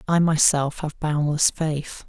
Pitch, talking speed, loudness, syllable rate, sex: 155 Hz, 145 wpm, -21 LUFS, 3.7 syllables/s, male